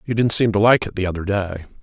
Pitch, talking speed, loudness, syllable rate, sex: 100 Hz, 295 wpm, -18 LUFS, 6.4 syllables/s, male